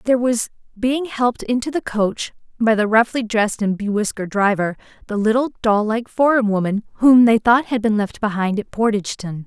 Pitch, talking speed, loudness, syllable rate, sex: 225 Hz, 185 wpm, -18 LUFS, 5.5 syllables/s, female